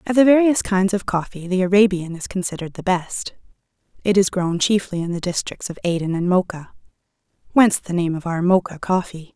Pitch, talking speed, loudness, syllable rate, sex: 185 Hz, 195 wpm, -20 LUFS, 5.7 syllables/s, female